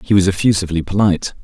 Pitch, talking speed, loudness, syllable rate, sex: 95 Hz, 170 wpm, -16 LUFS, 7.8 syllables/s, male